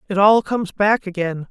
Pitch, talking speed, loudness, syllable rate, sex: 200 Hz, 200 wpm, -18 LUFS, 5.3 syllables/s, female